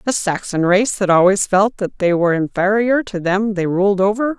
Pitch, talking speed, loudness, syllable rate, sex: 195 Hz, 205 wpm, -16 LUFS, 4.9 syllables/s, female